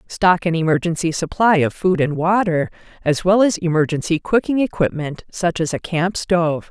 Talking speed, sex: 170 wpm, female